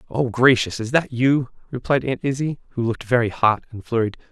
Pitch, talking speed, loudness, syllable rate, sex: 120 Hz, 195 wpm, -21 LUFS, 5.6 syllables/s, male